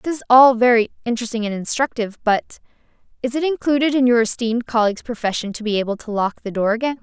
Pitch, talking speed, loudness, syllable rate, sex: 235 Hz, 205 wpm, -19 LUFS, 6.7 syllables/s, female